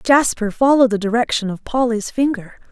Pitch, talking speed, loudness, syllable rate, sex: 235 Hz, 155 wpm, -17 LUFS, 5.5 syllables/s, female